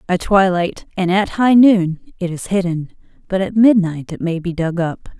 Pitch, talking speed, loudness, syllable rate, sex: 185 Hz, 195 wpm, -16 LUFS, 4.7 syllables/s, female